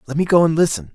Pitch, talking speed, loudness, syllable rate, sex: 150 Hz, 315 wpm, -16 LUFS, 7.7 syllables/s, male